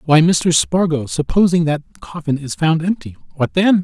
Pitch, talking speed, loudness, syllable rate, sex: 160 Hz, 155 wpm, -17 LUFS, 4.6 syllables/s, male